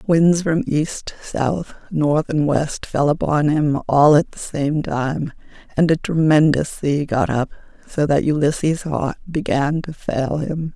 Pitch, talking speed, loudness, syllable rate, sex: 150 Hz, 160 wpm, -19 LUFS, 3.7 syllables/s, female